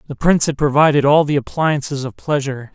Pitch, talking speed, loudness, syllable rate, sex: 145 Hz, 195 wpm, -16 LUFS, 6.2 syllables/s, male